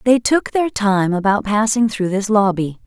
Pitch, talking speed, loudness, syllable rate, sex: 210 Hz, 190 wpm, -17 LUFS, 4.4 syllables/s, female